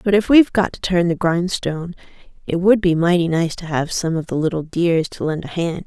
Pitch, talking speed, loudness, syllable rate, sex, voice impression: 170 Hz, 245 wpm, -18 LUFS, 5.5 syllables/s, female, very feminine, adult-like, slightly middle-aged, thin, slightly relaxed, slightly weak, slightly dark, soft, clear, fluent, slightly cute, intellectual, refreshing, slightly sincere, very calm, friendly, reassuring, unique, elegant, sweet, kind, slightly sharp, light